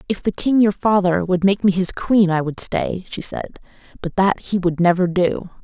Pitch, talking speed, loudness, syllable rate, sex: 185 Hz, 225 wpm, -18 LUFS, 4.7 syllables/s, female